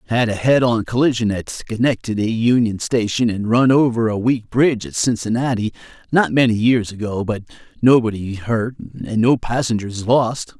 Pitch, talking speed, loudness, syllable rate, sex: 115 Hz, 160 wpm, -18 LUFS, 4.9 syllables/s, male